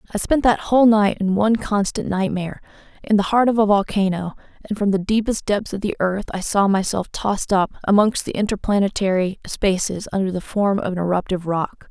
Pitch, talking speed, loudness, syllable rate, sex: 200 Hz, 195 wpm, -20 LUFS, 5.7 syllables/s, female